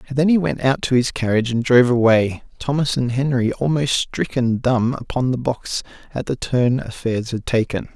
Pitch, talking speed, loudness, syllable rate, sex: 125 Hz, 195 wpm, -19 LUFS, 5.1 syllables/s, male